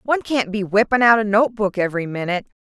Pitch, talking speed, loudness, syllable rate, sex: 215 Hz, 230 wpm, -18 LUFS, 6.7 syllables/s, female